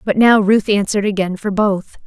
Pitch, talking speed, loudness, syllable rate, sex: 200 Hz, 205 wpm, -15 LUFS, 5.2 syllables/s, female